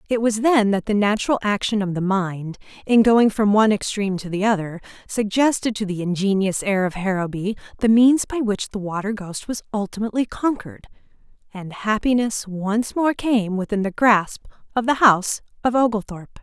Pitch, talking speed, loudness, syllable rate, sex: 210 Hz, 175 wpm, -20 LUFS, 5.4 syllables/s, female